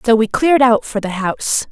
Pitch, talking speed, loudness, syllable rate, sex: 230 Hz, 245 wpm, -15 LUFS, 5.7 syllables/s, female